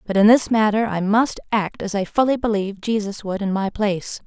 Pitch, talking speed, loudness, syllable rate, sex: 210 Hz, 225 wpm, -20 LUFS, 5.5 syllables/s, female